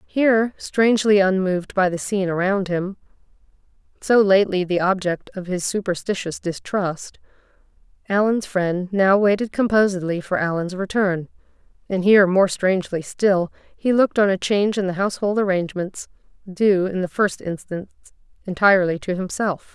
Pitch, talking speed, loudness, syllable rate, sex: 190 Hz, 140 wpm, -20 LUFS, 5.2 syllables/s, female